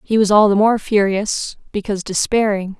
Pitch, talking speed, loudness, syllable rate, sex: 205 Hz, 170 wpm, -17 LUFS, 5.1 syllables/s, female